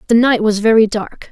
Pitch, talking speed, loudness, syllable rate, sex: 220 Hz, 225 wpm, -13 LUFS, 5.4 syllables/s, female